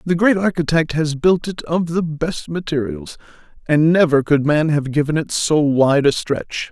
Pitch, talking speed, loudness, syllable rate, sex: 155 Hz, 190 wpm, -17 LUFS, 4.4 syllables/s, male